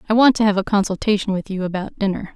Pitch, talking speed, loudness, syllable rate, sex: 200 Hz, 255 wpm, -19 LUFS, 6.9 syllables/s, female